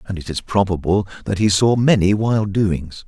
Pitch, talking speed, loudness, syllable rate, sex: 100 Hz, 195 wpm, -18 LUFS, 4.7 syllables/s, male